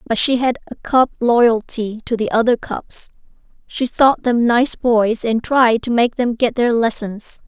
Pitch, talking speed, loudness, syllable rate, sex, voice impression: 235 Hz, 185 wpm, -16 LUFS, 4.0 syllables/s, female, feminine, slightly adult-like, slightly cute, slightly refreshing, friendly, slightly kind